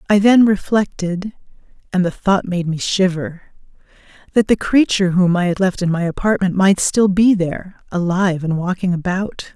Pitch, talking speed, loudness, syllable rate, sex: 185 Hz, 170 wpm, -17 LUFS, 5.0 syllables/s, female